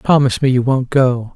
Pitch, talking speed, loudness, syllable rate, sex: 130 Hz, 220 wpm, -15 LUFS, 5.6 syllables/s, male